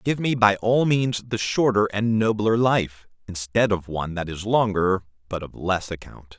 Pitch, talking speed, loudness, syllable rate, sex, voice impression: 105 Hz, 190 wpm, -22 LUFS, 4.5 syllables/s, male, very masculine, very adult-like, very middle-aged, very thick, tensed, very powerful, bright, soft, clear, very fluent, slightly raspy, very cool, intellectual, refreshing, sincere, very calm, very mature, very friendly, very reassuring, very unique, elegant, wild, sweet, lively, kind